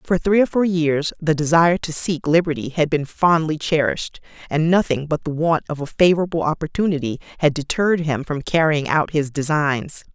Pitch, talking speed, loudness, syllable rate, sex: 160 Hz, 185 wpm, -19 LUFS, 5.4 syllables/s, female